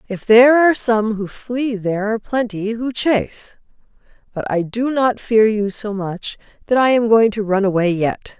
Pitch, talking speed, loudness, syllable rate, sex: 220 Hz, 195 wpm, -17 LUFS, 4.8 syllables/s, female